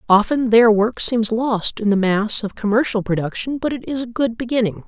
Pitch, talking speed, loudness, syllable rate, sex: 225 Hz, 210 wpm, -18 LUFS, 5.1 syllables/s, female